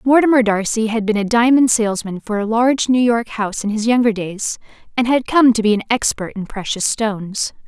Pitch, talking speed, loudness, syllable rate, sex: 225 Hz, 210 wpm, -17 LUFS, 5.6 syllables/s, female